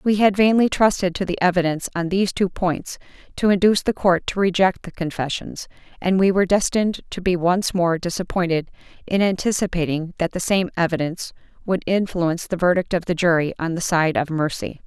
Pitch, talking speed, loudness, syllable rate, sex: 180 Hz, 185 wpm, -20 LUFS, 5.7 syllables/s, female